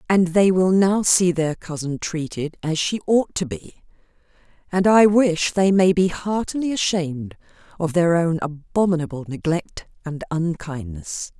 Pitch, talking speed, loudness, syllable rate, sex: 170 Hz, 145 wpm, -20 LUFS, 4.4 syllables/s, female